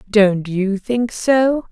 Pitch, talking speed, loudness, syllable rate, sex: 215 Hz, 140 wpm, -17 LUFS, 2.6 syllables/s, female